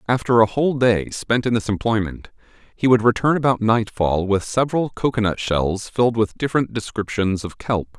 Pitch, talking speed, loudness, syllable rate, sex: 110 Hz, 175 wpm, -20 LUFS, 5.3 syllables/s, male